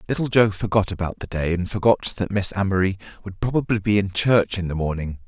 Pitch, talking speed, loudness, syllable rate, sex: 100 Hz, 215 wpm, -22 LUFS, 5.9 syllables/s, male